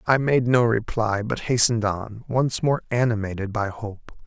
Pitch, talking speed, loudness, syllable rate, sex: 115 Hz, 170 wpm, -22 LUFS, 4.5 syllables/s, male